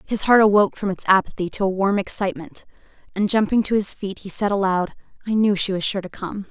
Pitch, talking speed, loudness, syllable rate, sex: 200 Hz, 230 wpm, -20 LUFS, 6.1 syllables/s, female